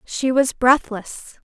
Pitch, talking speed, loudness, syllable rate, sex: 250 Hz, 125 wpm, -18 LUFS, 3.2 syllables/s, female